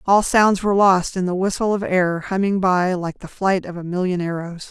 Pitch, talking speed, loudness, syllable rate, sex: 185 Hz, 230 wpm, -19 LUFS, 5.0 syllables/s, female